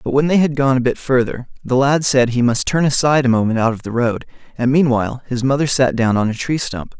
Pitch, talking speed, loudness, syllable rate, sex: 130 Hz, 265 wpm, -16 LUFS, 6.0 syllables/s, male